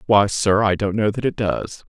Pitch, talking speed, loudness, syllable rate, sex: 105 Hz, 250 wpm, -19 LUFS, 4.7 syllables/s, male